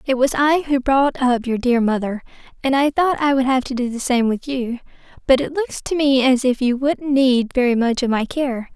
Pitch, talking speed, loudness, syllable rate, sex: 260 Hz, 245 wpm, -18 LUFS, 5.0 syllables/s, female